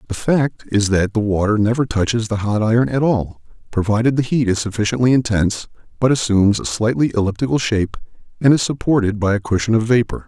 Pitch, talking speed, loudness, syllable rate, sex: 110 Hz, 195 wpm, -17 LUFS, 6.2 syllables/s, male